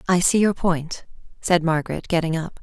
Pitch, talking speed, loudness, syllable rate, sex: 170 Hz, 185 wpm, -21 LUFS, 5.2 syllables/s, female